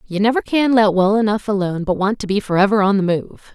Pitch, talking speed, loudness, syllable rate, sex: 205 Hz, 255 wpm, -17 LUFS, 6.1 syllables/s, female